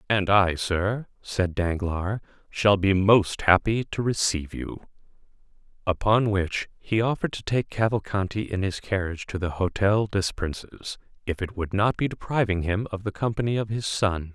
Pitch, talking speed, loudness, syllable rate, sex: 100 Hz, 165 wpm, -25 LUFS, 4.7 syllables/s, male